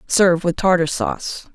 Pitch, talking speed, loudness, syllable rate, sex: 190 Hz, 155 wpm, -18 LUFS, 5.2 syllables/s, female